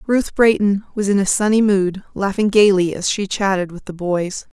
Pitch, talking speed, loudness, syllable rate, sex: 195 Hz, 195 wpm, -17 LUFS, 4.8 syllables/s, female